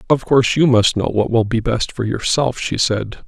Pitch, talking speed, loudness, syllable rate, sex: 120 Hz, 240 wpm, -17 LUFS, 4.9 syllables/s, male